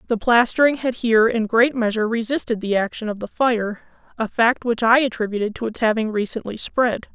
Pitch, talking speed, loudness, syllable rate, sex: 230 Hz, 195 wpm, -20 LUFS, 5.7 syllables/s, female